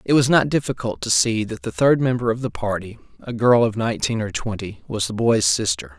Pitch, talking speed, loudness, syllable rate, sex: 115 Hz, 230 wpm, -20 LUFS, 5.5 syllables/s, male